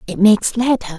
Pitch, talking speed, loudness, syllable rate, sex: 210 Hz, 180 wpm, -15 LUFS, 6.0 syllables/s, male